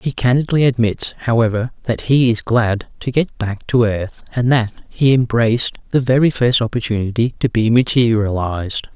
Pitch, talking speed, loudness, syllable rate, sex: 115 Hz, 160 wpm, -17 LUFS, 4.9 syllables/s, male